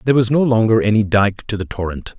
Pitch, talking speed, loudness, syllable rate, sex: 110 Hz, 245 wpm, -16 LUFS, 6.3 syllables/s, male